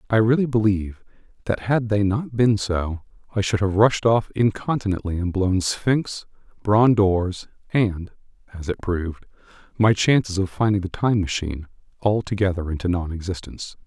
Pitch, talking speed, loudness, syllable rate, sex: 100 Hz, 155 wpm, -22 LUFS, 5.0 syllables/s, male